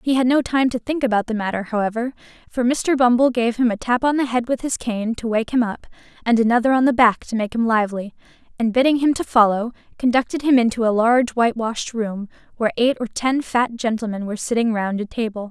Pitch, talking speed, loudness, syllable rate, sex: 235 Hz, 230 wpm, -20 LUFS, 6.0 syllables/s, female